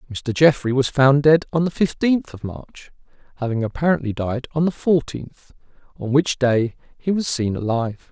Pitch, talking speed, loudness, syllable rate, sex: 135 Hz, 170 wpm, -20 LUFS, 4.8 syllables/s, male